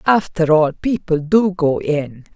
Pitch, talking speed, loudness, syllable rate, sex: 175 Hz, 155 wpm, -17 LUFS, 3.7 syllables/s, female